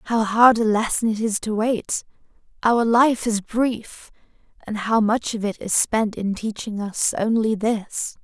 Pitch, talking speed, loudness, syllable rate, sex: 220 Hz, 175 wpm, -21 LUFS, 3.8 syllables/s, female